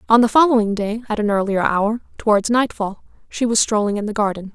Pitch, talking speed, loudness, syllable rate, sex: 215 Hz, 210 wpm, -18 LUFS, 5.9 syllables/s, female